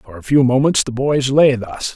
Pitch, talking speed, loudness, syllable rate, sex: 130 Hz, 245 wpm, -15 LUFS, 4.8 syllables/s, male